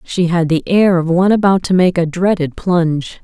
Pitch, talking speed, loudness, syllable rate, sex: 175 Hz, 220 wpm, -14 LUFS, 5.2 syllables/s, female